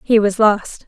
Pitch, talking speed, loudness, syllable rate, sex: 210 Hz, 205 wpm, -15 LUFS, 3.9 syllables/s, female